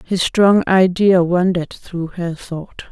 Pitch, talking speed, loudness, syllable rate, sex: 180 Hz, 145 wpm, -16 LUFS, 3.7 syllables/s, female